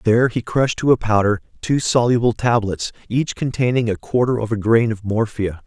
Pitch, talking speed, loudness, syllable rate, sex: 115 Hz, 190 wpm, -19 LUFS, 5.4 syllables/s, male